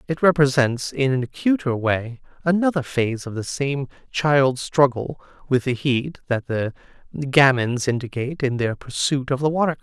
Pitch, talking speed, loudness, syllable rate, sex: 135 Hz, 165 wpm, -21 LUFS, 4.9 syllables/s, male